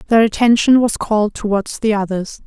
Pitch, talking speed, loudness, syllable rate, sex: 215 Hz, 170 wpm, -16 LUFS, 5.4 syllables/s, female